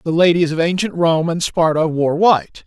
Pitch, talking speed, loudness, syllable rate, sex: 170 Hz, 205 wpm, -16 LUFS, 5.1 syllables/s, male